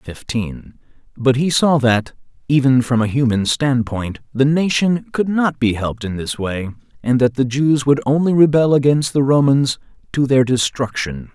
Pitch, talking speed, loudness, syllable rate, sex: 130 Hz, 170 wpm, -17 LUFS, 4.7 syllables/s, male